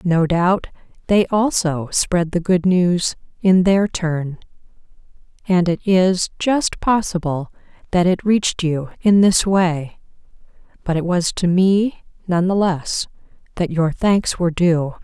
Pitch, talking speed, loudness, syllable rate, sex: 180 Hz, 145 wpm, -18 LUFS, 3.8 syllables/s, female